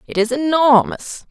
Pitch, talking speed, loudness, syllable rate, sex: 270 Hz, 140 wpm, -15 LUFS, 4.4 syllables/s, female